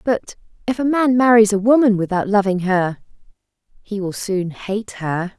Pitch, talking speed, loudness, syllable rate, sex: 210 Hz, 165 wpm, -18 LUFS, 4.6 syllables/s, female